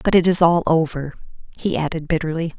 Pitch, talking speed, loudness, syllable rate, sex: 165 Hz, 185 wpm, -19 LUFS, 5.9 syllables/s, female